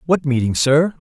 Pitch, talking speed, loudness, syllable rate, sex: 145 Hz, 165 wpm, -17 LUFS, 4.7 syllables/s, male